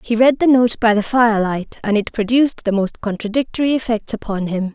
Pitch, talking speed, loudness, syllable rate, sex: 225 Hz, 200 wpm, -17 LUFS, 5.7 syllables/s, female